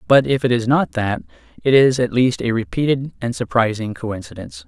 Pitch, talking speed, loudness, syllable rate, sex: 120 Hz, 195 wpm, -18 LUFS, 5.5 syllables/s, male